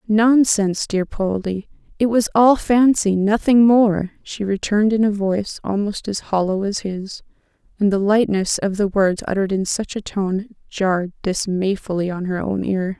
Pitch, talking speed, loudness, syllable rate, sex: 200 Hz, 160 wpm, -19 LUFS, 4.6 syllables/s, female